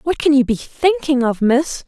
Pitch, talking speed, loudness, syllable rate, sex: 280 Hz, 225 wpm, -16 LUFS, 4.5 syllables/s, female